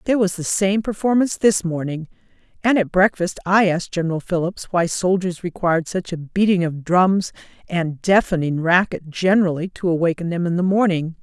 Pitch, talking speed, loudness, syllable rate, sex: 180 Hz, 170 wpm, -19 LUFS, 5.5 syllables/s, female